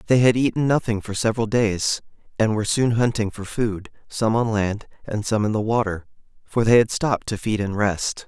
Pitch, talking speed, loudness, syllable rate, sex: 110 Hz, 210 wpm, -22 LUFS, 5.3 syllables/s, male